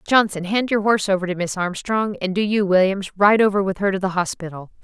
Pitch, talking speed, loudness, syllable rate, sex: 195 Hz, 235 wpm, -19 LUFS, 5.9 syllables/s, female